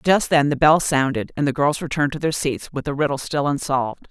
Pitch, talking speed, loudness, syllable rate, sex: 145 Hz, 250 wpm, -20 LUFS, 5.9 syllables/s, female